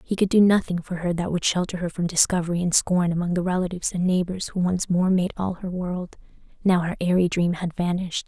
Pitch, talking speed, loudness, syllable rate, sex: 180 Hz, 230 wpm, -23 LUFS, 5.9 syllables/s, female